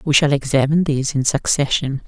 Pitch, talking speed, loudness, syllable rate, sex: 140 Hz, 175 wpm, -17 LUFS, 6.1 syllables/s, female